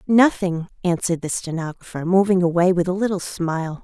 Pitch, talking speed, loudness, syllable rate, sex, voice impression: 180 Hz, 155 wpm, -21 LUFS, 5.7 syllables/s, female, feminine, very adult-like, slightly bright, slightly refreshing, slightly calm, friendly, slightly reassuring